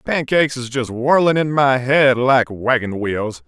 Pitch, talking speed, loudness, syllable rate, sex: 130 Hz, 175 wpm, -17 LUFS, 4.2 syllables/s, male